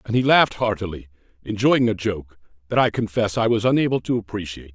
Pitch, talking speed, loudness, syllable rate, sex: 105 Hz, 190 wpm, -21 LUFS, 6.3 syllables/s, male